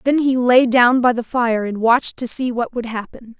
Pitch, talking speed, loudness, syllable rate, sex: 240 Hz, 250 wpm, -17 LUFS, 4.9 syllables/s, female